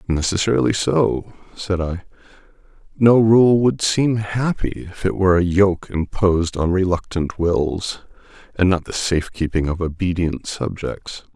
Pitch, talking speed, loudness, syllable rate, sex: 95 Hz, 135 wpm, -19 LUFS, 4.4 syllables/s, male